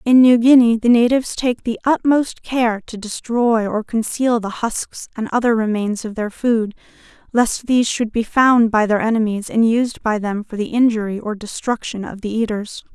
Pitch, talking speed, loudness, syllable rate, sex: 225 Hz, 190 wpm, -18 LUFS, 4.8 syllables/s, female